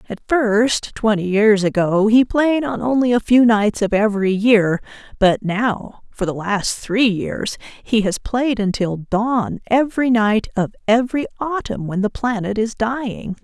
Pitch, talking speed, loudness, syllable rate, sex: 220 Hz, 165 wpm, -18 LUFS, 4.1 syllables/s, female